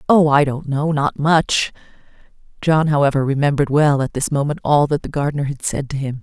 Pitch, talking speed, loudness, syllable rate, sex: 145 Hz, 205 wpm, -18 LUFS, 5.7 syllables/s, female